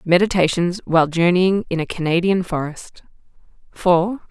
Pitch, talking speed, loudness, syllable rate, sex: 175 Hz, 110 wpm, -18 LUFS, 4.8 syllables/s, female